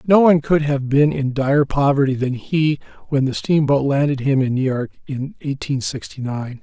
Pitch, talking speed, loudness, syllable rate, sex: 140 Hz, 200 wpm, -19 LUFS, 5.1 syllables/s, male